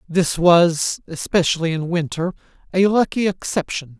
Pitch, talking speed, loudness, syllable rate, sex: 175 Hz, 120 wpm, -19 LUFS, 4.5 syllables/s, male